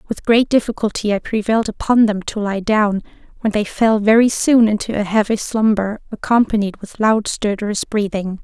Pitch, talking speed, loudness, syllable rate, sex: 215 Hz, 170 wpm, -17 LUFS, 5.2 syllables/s, female